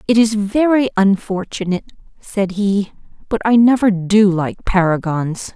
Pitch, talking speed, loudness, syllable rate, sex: 200 Hz, 130 wpm, -16 LUFS, 4.4 syllables/s, female